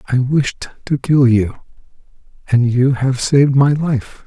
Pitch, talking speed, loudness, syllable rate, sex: 130 Hz, 155 wpm, -15 LUFS, 4.0 syllables/s, male